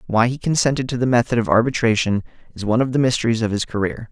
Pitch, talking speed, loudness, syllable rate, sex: 120 Hz, 235 wpm, -19 LUFS, 7.1 syllables/s, male